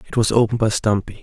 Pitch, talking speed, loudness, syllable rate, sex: 110 Hz, 245 wpm, -18 LUFS, 7.6 syllables/s, male